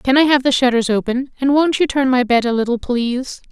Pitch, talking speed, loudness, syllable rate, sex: 255 Hz, 255 wpm, -16 LUFS, 5.7 syllables/s, female